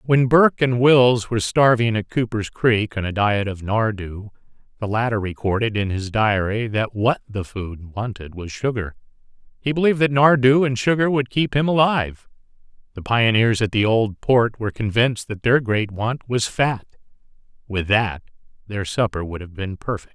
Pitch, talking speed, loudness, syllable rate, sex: 115 Hz, 175 wpm, -20 LUFS, 4.8 syllables/s, male